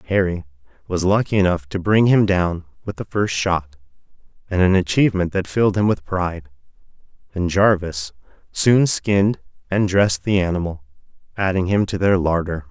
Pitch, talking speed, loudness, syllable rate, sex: 95 Hz, 150 wpm, -19 LUFS, 5.1 syllables/s, male